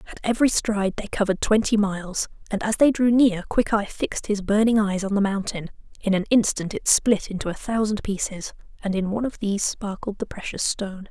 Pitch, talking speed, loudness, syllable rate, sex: 205 Hz, 205 wpm, -23 LUFS, 5.9 syllables/s, female